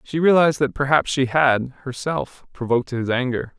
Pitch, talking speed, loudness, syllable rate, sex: 135 Hz, 165 wpm, -20 LUFS, 5.0 syllables/s, male